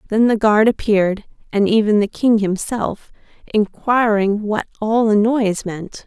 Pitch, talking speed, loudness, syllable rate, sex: 215 Hz, 150 wpm, -17 LUFS, 4.3 syllables/s, female